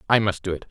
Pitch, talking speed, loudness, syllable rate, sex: 100 Hz, 340 wpm, -23 LUFS, 7.7 syllables/s, male